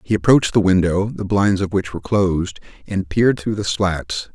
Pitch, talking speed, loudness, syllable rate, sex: 95 Hz, 205 wpm, -18 LUFS, 5.4 syllables/s, male